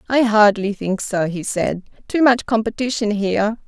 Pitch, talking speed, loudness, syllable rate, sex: 215 Hz, 165 wpm, -18 LUFS, 4.8 syllables/s, female